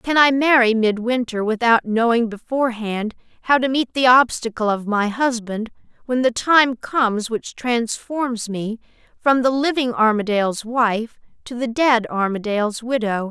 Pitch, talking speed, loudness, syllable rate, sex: 235 Hz, 145 wpm, -19 LUFS, 4.4 syllables/s, female